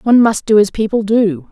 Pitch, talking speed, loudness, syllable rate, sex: 210 Hz, 235 wpm, -13 LUFS, 5.7 syllables/s, female